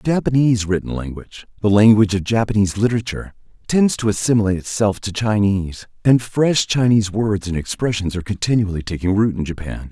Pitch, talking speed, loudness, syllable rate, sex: 105 Hz, 165 wpm, -18 LUFS, 6.4 syllables/s, male